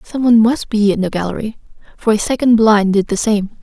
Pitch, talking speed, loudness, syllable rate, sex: 215 Hz, 215 wpm, -14 LUFS, 5.8 syllables/s, female